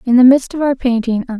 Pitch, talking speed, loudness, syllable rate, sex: 250 Hz, 300 wpm, -13 LUFS, 6.4 syllables/s, female